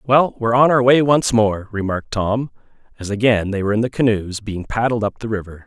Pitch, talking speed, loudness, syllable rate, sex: 110 Hz, 220 wpm, -18 LUFS, 5.7 syllables/s, male